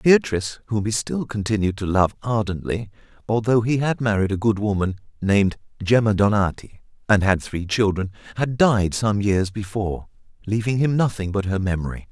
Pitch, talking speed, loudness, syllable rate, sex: 105 Hz, 165 wpm, -22 LUFS, 4.9 syllables/s, male